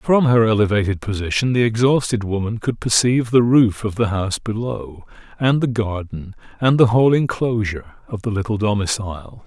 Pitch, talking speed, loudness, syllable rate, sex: 110 Hz, 165 wpm, -18 LUFS, 5.4 syllables/s, male